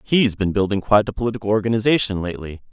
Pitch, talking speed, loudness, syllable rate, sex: 105 Hz, 175 wpm, -19 LUFS, 7.5 syllables/s, male